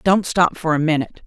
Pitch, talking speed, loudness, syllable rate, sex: 165 Hz, 235 wpm, -18 LUFS, 6.0 syllables/s, female